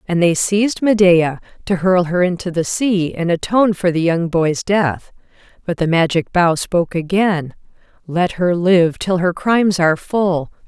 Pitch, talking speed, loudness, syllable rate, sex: 180 Hz, 175 wpm, -16 LUFS, 4.5 syllables/s, female